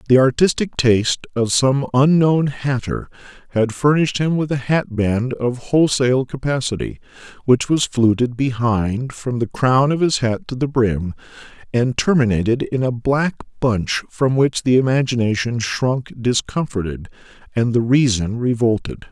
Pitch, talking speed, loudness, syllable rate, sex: 125 Hz, 140 wpm, -18 LUFS, 4.4 syllables/s, male